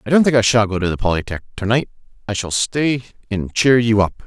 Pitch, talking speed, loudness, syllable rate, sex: 110 Hz, 255 wpm, -18 LUFS, 6.0 syllables/s, male